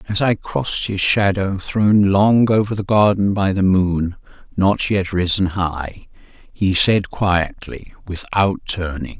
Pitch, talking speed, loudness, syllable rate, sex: 95 Hz, 145 wpm, -18 LUFS, 3.7 syllables/s, male